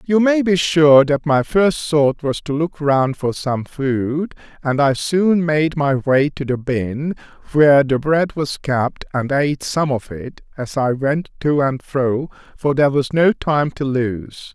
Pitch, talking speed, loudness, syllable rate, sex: 145 Hz, 195 wpm, -17 LUFS, 3.8 syllables/s, male